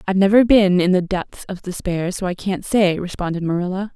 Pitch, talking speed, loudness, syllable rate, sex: 185 Hz, 210 wpm, -18 LUFS, 5.6 syllables/s, female